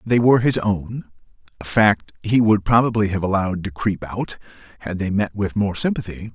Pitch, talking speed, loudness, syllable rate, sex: 105 Hz, 190 wpm, -20 LUFS, 5.2 syllables/s, male